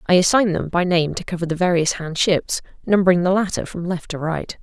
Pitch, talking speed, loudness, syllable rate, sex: 175 Hz, 235 wpm, -20 LUFS, 5.9 syllables/s, female